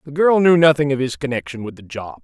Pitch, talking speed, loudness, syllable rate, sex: 135 Hz, 270 wpm, -16 LUFS, 6.2 syllables/s, male